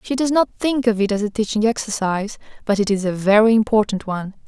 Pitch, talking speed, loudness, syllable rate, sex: 215 Hz, 230 wpm, -19 LUFS, 6.2 syllables/s, female